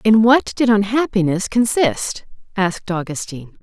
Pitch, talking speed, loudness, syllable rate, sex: 210 Hz, 115 wpm, -17 LUFS, 4.7 syllables/s, female